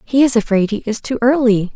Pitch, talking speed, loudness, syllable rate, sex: 230 Hz, 240 wpm, -15 LUFS, 5.7 syllables/s, female